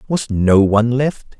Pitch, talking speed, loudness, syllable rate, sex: 120 Hz, 170 wpm, -15 LUFS, 4.1 syllables/s, male